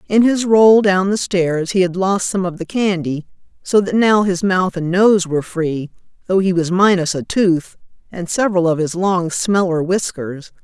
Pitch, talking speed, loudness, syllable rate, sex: 185 Hz, 200 wpm, -16 LUFS, 4.5 syllables/s, female